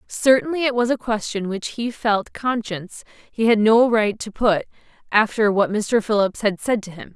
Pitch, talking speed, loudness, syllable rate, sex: 220 Hz, 195 wpm, -20 LUFS, 4.5 syllables/s, female